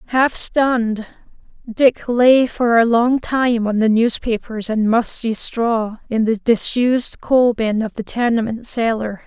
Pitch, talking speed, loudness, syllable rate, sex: 230 Hz, 150 wpm, -17 LUFS, 3.8 syllables/s, female